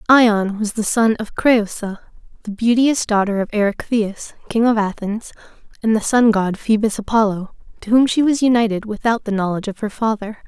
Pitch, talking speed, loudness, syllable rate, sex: 220 Hz, 175 wpm, -18 LUFS, 4.0 syllables/s, female